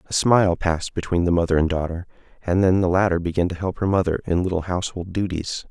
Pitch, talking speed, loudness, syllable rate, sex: 90 Hz, 220 wpm, -21 LUFS, 6.4 syllables/s, male